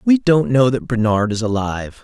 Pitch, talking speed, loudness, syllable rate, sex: 120 Hz, 205 wpm, -17 LUFS, 5.2 syllables/s, male